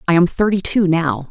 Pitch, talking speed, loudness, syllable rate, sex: 175 Hz, 230 wpm, -16 LUFS, 5.2 syllables/s, female